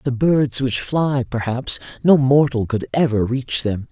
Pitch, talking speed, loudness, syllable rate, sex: 130 Hz, 170 wpm, -18 LUFS, 4.0 syllables/s, male